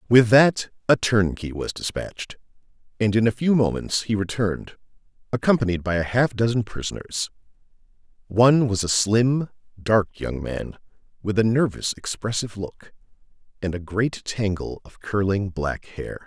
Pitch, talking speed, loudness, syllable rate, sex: 110 Hz, 145 wpm, -23 LUFS, 4.7 syllables/s, male